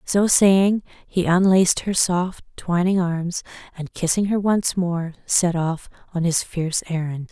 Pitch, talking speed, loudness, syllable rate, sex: 180 Hz, 155 wpm, -20 LUFS, 4.0 syllables/s, female